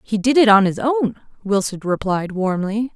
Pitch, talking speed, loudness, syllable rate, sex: 215 Hz, 185 wpm, -18 LUFS, 4.8 syllables/s, female